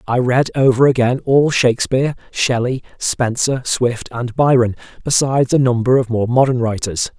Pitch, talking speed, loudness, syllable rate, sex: 125 Hz, 150 wpm, -16 LUFS, 4.9 syllables/s, male